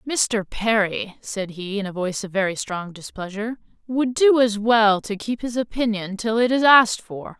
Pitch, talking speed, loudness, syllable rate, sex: 215 Hz, 195 wpm, -21 LUFS, 4.8 syllables/s, female